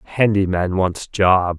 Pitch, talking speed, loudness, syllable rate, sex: 95 Hz, 150 wpm, -18 LUFS, 3.2 syllables/s, male